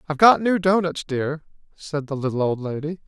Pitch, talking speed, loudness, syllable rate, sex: 155 Hz, 195 wpm, -21 LUFS, 5.5 syllables/s, male